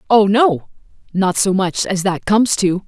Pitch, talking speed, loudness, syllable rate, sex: 195 Hz, 190 wpm, -16 LUFS, 4.4 syllables/s, female